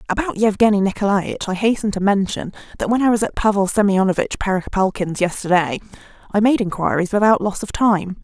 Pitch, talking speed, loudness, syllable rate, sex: 200 Hz, 165 wpm, -18 LUFS, 5.9 syllables/s, female